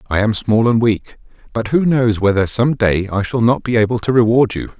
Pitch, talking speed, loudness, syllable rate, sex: 115 Hz, 240 wpm, -15 LUFS, 5.2 syllables/s, male